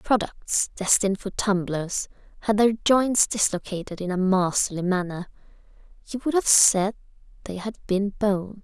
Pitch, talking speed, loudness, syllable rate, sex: 200 Hz, 130 wpm, -23 LUFS, 4.6 syllables/s, female